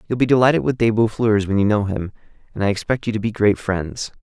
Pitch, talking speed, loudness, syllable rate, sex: 105 Hz, 255 wpm, -19 LUFS, 6.2 syllables/s, male